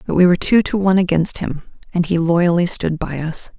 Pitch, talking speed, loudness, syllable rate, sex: 175 Hz, 235 wpm, -17 LUFS, 5.7 syllables/s, female